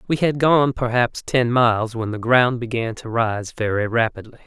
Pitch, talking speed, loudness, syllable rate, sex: 120 Hz, 190 wpm, -20 LUFS, 4.7 syllables/s, male